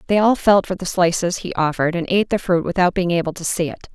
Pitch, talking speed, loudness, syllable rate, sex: 180 Hz, 275 wpm, -19 LUFS, 6.7 syllables/s, female